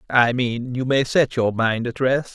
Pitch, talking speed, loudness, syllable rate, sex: 125 Hz, 230 wpm, -20 LUFS, 4.2 syllables/s, male